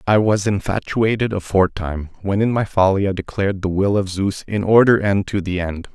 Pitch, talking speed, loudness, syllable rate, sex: 100 Hz, 200 wpm, -19 LUFS, 5.5 syllables/s, male